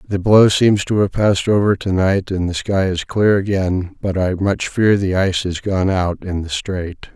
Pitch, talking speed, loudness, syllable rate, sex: 95 Hz, 225 wpm, -17 LUFS, 4.6 syllables/s, male